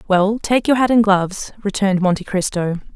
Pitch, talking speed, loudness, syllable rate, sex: 200 Hz, 185 wpm, -17 LUFS, 5.5 syllables/s, female